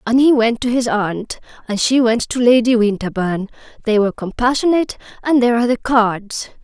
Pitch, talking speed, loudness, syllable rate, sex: 235 Hz, 155 wpm, -16 LUFS, 5.6 syllables/s, female